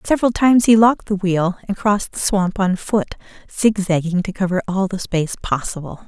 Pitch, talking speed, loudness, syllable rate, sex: 195 Hz, 190 wpm, -18 LUFS, 5.6 syllables/s, female